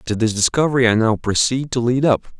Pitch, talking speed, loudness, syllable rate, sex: 120 Hz, 225 wpm, -17 LUFS, 5.9 syllables/s, male